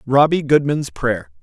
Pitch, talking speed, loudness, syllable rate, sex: 135 Hz, 125 wpm, -17 LUFS, 4.1 syllables/s, male